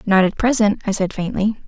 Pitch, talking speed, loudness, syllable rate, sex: 205 Hz, 215 wpm, -18 LUFS, 5.5 syllables/s, female